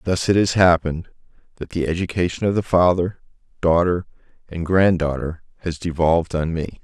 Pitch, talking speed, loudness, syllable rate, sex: 85 Hz, 160 wpm, -20 LUFS, 5.4 syllables/s, male